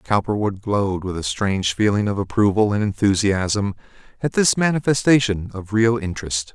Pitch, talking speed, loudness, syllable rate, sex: 105 Hz, 145 wpm, -20 LUFS, 5.2 syllables/s, male